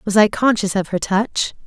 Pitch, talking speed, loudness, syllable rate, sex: 200 Hz, 215 wpm, -18 LUFS, 4.8 syllables/s, female